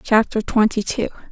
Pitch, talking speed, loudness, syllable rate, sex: 220 Hz, 135 wpm, -19 LUFS, 5.0 syllables/s, female